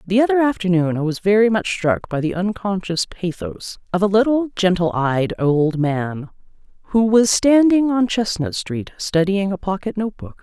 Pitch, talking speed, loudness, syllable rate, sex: 190 Hz, 165 wpm, -19 LUFS, 4.7 syllables/s, female